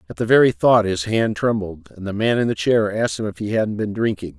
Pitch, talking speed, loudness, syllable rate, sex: 110 Hz, 285 wpm, -19 LUFS, 6.0 syllables/s, male